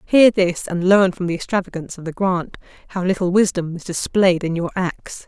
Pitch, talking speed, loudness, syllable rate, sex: 180 Hz, 205 wpm, -19 LUFS, 5.3 syllables/s, female